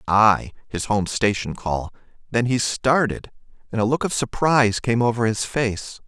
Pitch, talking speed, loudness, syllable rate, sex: 115 Hz, 150 wpm, -21 LUFS, 4.5 syllables/s, male